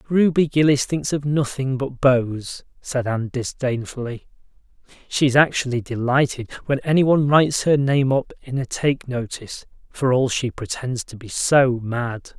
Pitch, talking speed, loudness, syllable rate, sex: 130 Hz, 150 wpm, -21 LUFS, 4.5 syllables/s, male